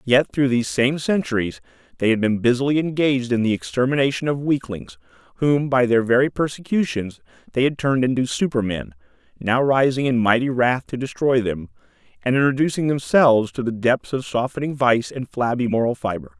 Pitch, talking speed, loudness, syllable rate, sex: 125 Hz, 175 wpm, -20 LUFS, 5.6 syllables/s, male